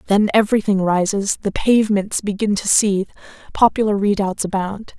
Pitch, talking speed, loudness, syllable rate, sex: 200 Hz, 130 wpm, -18 LUFS, 5.4 syllables/s, female